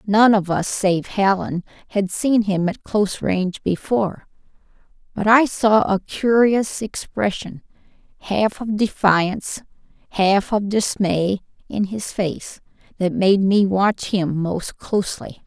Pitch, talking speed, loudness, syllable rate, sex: 200 Hz, 130 wpm, -20 LUFS, 3.8 syllables/s, female